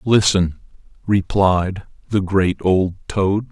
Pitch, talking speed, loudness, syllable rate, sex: 95 Hz, 105 wpm, -18 LUFS, 3.2 syllables/s, male